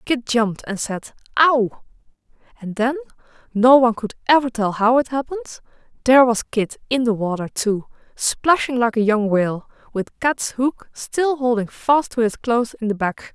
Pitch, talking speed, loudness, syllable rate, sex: 240 Hz, 165 wpm, -19 LUFS, 4.8 syllables/s, female